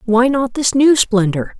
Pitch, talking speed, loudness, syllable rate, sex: 240 Hz, 190 wpm, -14 LUFS, 4.1 syllables/s, female